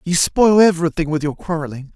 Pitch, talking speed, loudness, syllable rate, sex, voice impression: 165 Hz, 185 wpm, -16 LUFS, 6.0 syllables/s, male, masculine, adult-like, sincere, friendly, slightly unique, slightly sweet